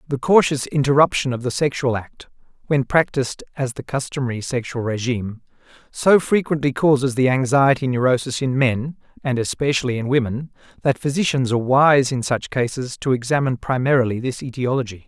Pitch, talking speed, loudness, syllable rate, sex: 130 Hz, 150 wpm, -20 LUFS, 5.6 syllables/s, male